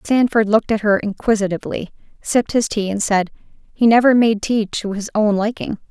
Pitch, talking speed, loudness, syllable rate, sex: 215 Hz, 185 wpm, -17 LUFS, 5.7 syllables/s, female